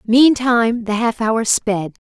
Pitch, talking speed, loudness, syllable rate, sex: 230 Hz, 145 wpm, -16 LUFS, 3.7 syllables/s, female